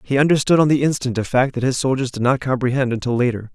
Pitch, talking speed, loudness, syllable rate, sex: 130 Hz, 255 wpm, -18 LUFS, 6.7 syllables/s, male